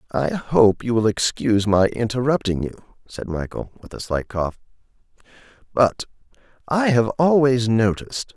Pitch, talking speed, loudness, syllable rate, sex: 120 Hz, 135 wpm, -20 LUFS, 4.6 syllables/s, male